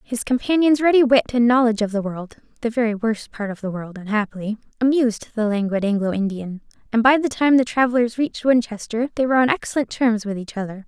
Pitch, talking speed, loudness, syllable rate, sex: 230 Hz, 200 wpm, -20 LUFS, 6.3 syllables/s, female